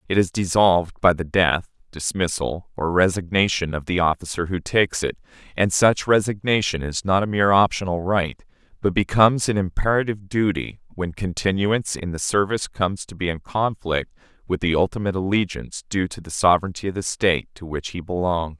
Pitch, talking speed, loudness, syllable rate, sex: 95 Hz, 175 wpm, -22 LUFS, 5.7 syllables/s, male